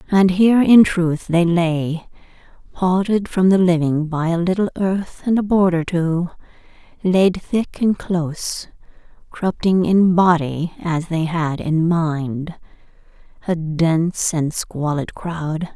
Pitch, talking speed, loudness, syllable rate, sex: 175 Hz, 125 wpm, -18 LUFS, 3.7 syllables/s, female